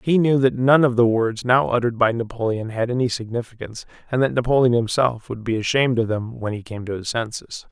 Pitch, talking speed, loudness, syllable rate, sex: 120 Hz, 225 wpm, -20 LUFS, 6.0 syllables/s, male